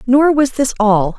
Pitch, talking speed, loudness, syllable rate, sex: 255 Hz, 205 wpm, -14 LUFS, 4.0 syllables/s, female